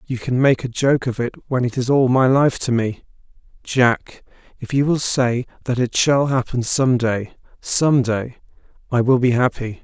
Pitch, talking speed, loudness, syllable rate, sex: 125 Hz, 185 wpm, -18 LUFS, 4.6 syllables/s, male